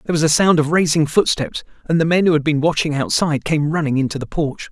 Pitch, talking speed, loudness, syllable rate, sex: 155 Hz, 255 wpm, -17 LUFS, 6.4 syllables/s, male